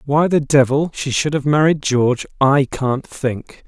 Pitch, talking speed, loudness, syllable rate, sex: 140 Hz, 180 wpm, -17 LUFS, 4.2 syllables/s, male